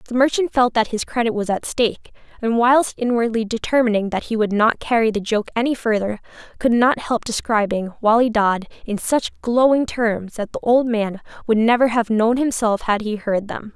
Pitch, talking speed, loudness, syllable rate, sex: 230 Hz, 195 wpm, -19 LUFS, 5.1 syllables/s, female